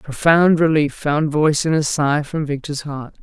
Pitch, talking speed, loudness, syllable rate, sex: 150 Hz, 185 wpm, -17 LUFS, 4.5 syllables/s, female